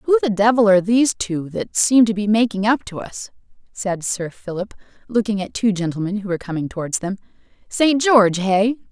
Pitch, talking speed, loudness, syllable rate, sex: 210 Hz, 195 wpm, -19 LUFS, 5.5 syllables/s, female